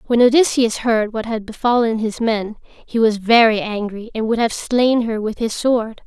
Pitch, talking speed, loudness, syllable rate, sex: 225 Hz, 200 wpm, -17 LUFS, 4.5 syllables/s, female